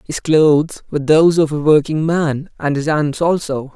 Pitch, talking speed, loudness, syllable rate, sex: 150 Hz, 190 wpm, -15 LUFS, 4.9 syllables/s, male